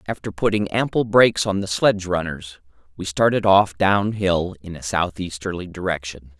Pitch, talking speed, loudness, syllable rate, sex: 95 Hz, 160 wpm, -20 LUFS, 5.0 syllables/s, male